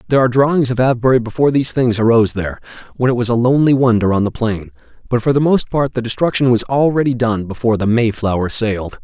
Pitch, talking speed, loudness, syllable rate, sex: 120 Hz, 220 wpm, -15 LUFS, 7.1 syllables/s, male